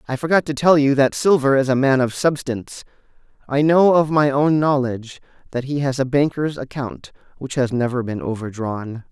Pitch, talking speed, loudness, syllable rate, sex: 135 Hz, 190 wpm, -19 LUFS, 5.2 syllables/s, male